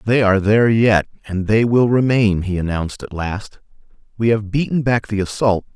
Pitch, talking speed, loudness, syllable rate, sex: 105 Hz, 190 wpm, -17 LUFS, 5.3 syllables/s, male